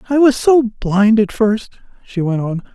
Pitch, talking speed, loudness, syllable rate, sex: 220 Hz, 195 wpm, -15 LUFS, 4.3 syllables/s, male